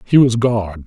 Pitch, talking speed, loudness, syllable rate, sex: 110 Hz, 210 wpm, -15 LUFS, 3.9 syllables/s, male